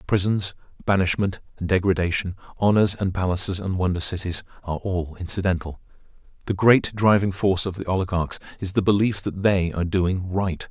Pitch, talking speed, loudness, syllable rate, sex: 95 Hz, 155 wpm, -23 LUFS, 5.6 syllables/s, male